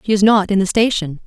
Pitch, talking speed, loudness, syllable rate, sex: 200 Hz, 285 wpm, -15 LUFS, 6.4 syllables/s, female